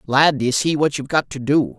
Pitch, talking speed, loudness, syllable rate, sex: 140 Hz, 270 wpm, -18 LUFS, 5.5 syllables/s, male